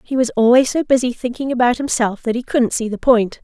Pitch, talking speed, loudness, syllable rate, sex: 245 Hz, 245 wpm, -17 LUFS, 5.8 syllables/s, female